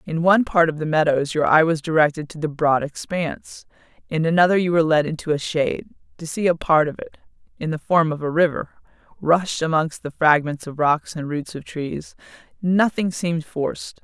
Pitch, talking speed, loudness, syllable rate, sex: 160 Hz, 200 wpm, -20 LUFS, 5.4 syllables/s, female